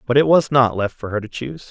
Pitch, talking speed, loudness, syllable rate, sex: 125 Hz, 315 wpm, -18 LUFS, 6.5 syllables/s, male